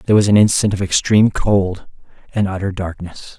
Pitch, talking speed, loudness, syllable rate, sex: 100 Hz, 175 wpm, -16 LUFS, 5.8 syllables/s, male